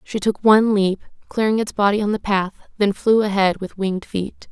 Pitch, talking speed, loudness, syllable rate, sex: 205 Hz, 210 wpm, -19 LUFS, 5.4 syllables/s, female